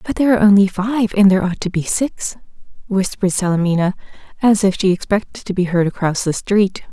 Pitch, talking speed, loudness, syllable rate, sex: 195 Hz, 200 wpm, -16 LUFS, 6.1 syllables/s, female